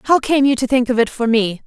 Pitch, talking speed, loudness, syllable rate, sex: 250 Hz, 325 wpm, -16 LUFS, 6.1 syllables/s, female